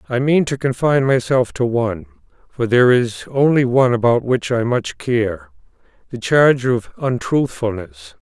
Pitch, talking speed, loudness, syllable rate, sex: 125 Hz, 145 wpm, -17 LUFS, 4.9 syllables/s, male